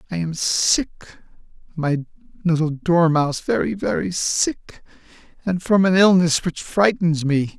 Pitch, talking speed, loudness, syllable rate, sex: 165 Hz, 120 wpm, -19 LUFS, 4.2 syllables/s, male